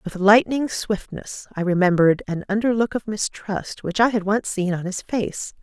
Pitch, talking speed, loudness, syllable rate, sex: 200 Hz, 190 wpm, -21 LUFS, 4.7 syllables/s, female